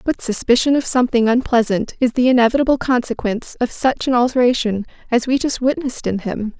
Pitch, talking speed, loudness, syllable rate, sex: 245 Hz, 175 wpm, -17 LUFS, 6.0 syllables/s, female